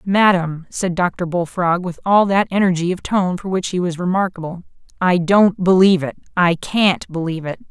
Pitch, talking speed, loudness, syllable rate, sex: 180 Hz, 170 wpm, -17 LUFS, 5.0 syllables/s, female